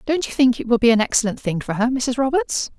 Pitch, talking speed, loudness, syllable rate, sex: 245 Hz, 280 wpm, -19 LUFS, 6.1 syllables/s, female